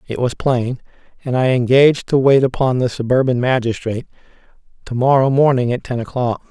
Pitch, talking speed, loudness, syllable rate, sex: 125 Hz, 165 wpm, -16 LUFS, 5.6 syllables/s, male